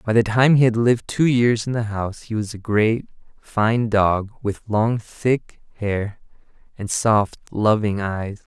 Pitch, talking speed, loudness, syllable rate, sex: 110 Hz, 175 wpm, -20 LUFS, 4.0 syllables/s, male